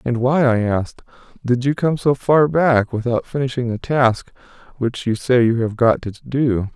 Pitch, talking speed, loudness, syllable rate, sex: 125 Hz, 195 wpm, -18 LUFS, 4.6 syllables/s, male